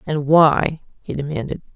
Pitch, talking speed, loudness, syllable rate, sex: 150 Hz, 135 wpm, -18 LUFS, 4.5 syllables/s, female